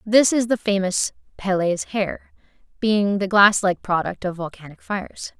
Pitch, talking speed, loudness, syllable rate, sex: 195 Hz, 155 wpm, -21 LUFS, 4.4 syllables/s, female